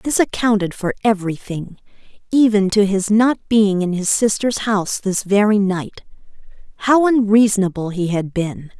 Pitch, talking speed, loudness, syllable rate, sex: 205 Hz, 145 wpm, -17 LUFS, 4.7 syllables/s, female